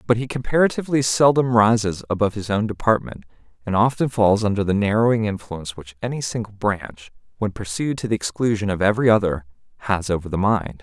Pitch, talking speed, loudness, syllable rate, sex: 105 Hz, 175 wpm, -21 LUFS, 6.1 syllables/s, male